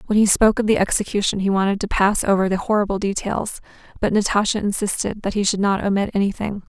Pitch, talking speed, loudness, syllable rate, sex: 200 Hz, 205 wpm, -20 LUFS, 6.4 syllables/s, female